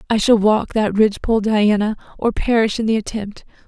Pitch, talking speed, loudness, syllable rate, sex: 215 Hz, 180 wpm, -17 LUFS, 5.6 syllables/s, female